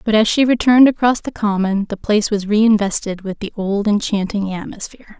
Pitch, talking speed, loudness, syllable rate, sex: 210 Hz, 185 wpm, -16 LUFS, 5.6 syllables/s, female